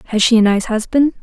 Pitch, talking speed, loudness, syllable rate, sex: 230 Hz, 245 wpm, -14 LUFS, 6.7 syllables/s, female